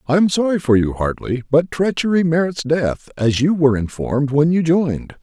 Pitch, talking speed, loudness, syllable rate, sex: 150 Hz, 195 wpm, -17 LUFS, 5.4 syllables/s, male